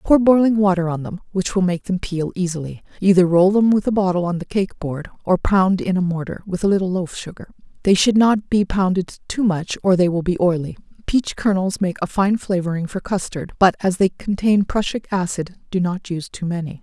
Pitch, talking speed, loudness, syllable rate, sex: 185 Hz, 220 wpm, -19 LUFS, 5.3 syllables/s, female